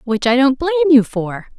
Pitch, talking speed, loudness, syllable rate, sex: 240 Hz, 225 wpm, -15 LUFS, 5.9 syllables/s, female